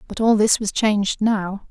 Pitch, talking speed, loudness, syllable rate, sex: 210 Hz, 210 wpm, -19 LUFS, 4.5 syllables/s, female